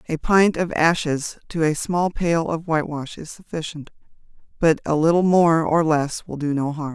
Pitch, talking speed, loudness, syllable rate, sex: 160 Hz, 190 wpm, -21 LUFS, 4.7 syllables/s, female